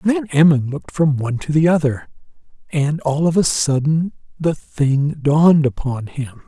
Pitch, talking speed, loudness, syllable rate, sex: 150 Hz, 165 wpm, -17 LUFS, 4.5 syllables/s, male